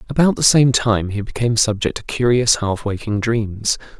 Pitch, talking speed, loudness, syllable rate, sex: 115 Hz, 180 wpm, -17 LUFS, 5.0 syllables/s, male